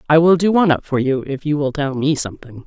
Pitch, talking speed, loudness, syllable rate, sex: 145 Hz, 290 wpm, -17 LUFS, 6.4 syllables/s, female